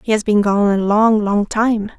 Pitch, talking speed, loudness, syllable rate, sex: 210 Hz, 240 wpm, -15 LUFS, 4.3 syllables/s, female